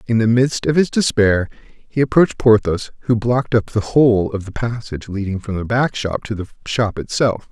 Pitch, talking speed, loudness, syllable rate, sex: 110 Hz, 210 wpm, -18 LUFS, 5.3 syllables/s, male